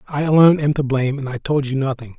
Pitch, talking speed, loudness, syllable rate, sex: 140 Hz, 275 wpm, -18 LUFS, 7.3 syllables/s, male